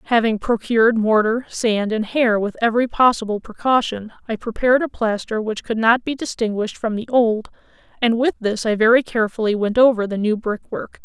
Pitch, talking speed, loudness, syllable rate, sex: 225 Hz, 185 wpm, -19 LUFS, 5.6 syllables/s, female